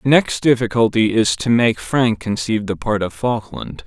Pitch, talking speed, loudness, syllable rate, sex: 115 Hz, 185 wpm, -17 LUFS, 4.8 syllables/s, male